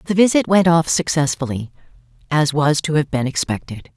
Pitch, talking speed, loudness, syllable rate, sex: 155 Hz, 165 wpm, -18 LUFS, 5.1 syllables/s, female